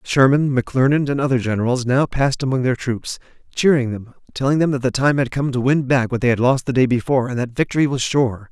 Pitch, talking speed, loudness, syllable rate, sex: 130 Hz, 240 wpm, -18 LUFS, 6.3 syllables/s, male